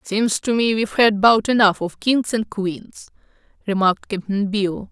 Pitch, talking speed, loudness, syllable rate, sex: 210 Hz, 170 wpm, -19 LUFS, 4.3 syllables/s, female